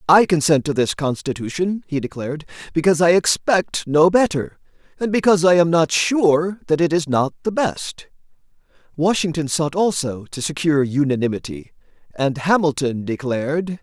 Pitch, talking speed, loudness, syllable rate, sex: 160 Hz, 145 wpm, -19 LUFS, 5.1 syllables/s, male